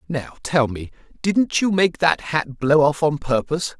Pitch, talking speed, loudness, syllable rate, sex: 155 Hz, 175 wpm, -20 LUFS, 4.3 syllables/s, male